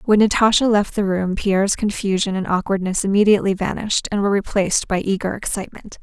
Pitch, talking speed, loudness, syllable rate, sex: 200 Hz, 170 wpm, -19 LUFS, 6.3 syllables/s, female